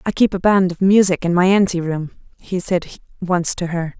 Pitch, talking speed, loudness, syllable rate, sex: 180 Hz, 225 wpm, -17 LUFS, 5.2 syllables/s, female